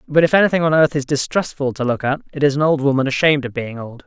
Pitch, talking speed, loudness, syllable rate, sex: 140 Hz, 280 wpm, -17 LUFS, 6.8 syllables/s, male